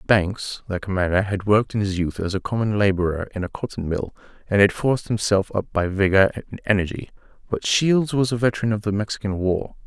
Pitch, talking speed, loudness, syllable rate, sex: 100 Hz, 205 wpm, -22 LUFS, 5.8 syllables/s, male